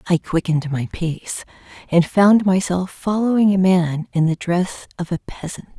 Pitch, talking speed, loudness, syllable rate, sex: 180 Hz, 165 wpm, -19 LUFS, 4.7 syllables/s, female